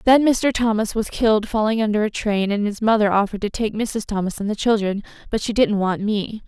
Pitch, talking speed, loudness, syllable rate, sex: 210 Hz, 230 wpm, -20 LUFS, 5.6 syllables/s, female